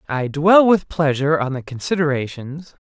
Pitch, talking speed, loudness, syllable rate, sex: 150 Hz, 145 wpm, -18 LUFS, 5.0 syllables/s, male